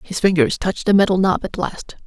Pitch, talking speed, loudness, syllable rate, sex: 190 Hz, 230 wpm, -18 LUFS, 5.8 syllables/s, female